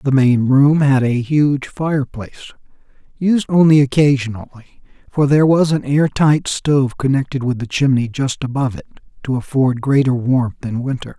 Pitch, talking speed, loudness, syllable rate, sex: 135 Hz, 160 wpm, -16 LUFS, 5.2 syllables/s, male